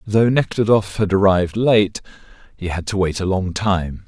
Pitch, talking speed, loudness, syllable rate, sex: 95 Hz, 175 wpm, -18 LUFS, 4.7 syllables/s, male